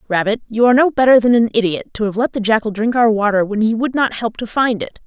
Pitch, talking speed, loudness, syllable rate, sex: 225 Hz, 285 wpm, -16 LUFS, 6.3 syllables/s, female